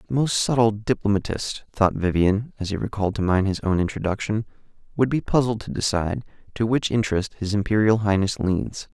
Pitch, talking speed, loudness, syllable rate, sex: 105 Hz, 175 wpm, -23 LUFS, 5.6 syllables/s, male